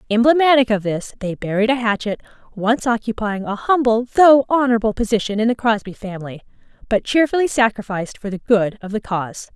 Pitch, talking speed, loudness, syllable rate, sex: 225 Hz, 170 wpm, -18 LUFS, 5.9 syllables/s, female